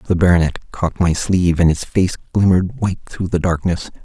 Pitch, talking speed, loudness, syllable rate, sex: 90 Hz, 195 wpm, -17 LUFS, 5.6 syllables/s, male